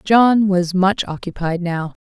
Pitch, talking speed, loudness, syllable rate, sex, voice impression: 185 Hz, 145 wpm, -17 LUFS, 3.7 syllables/s, female, very feminine, very adult-like, intellectual, slightly calm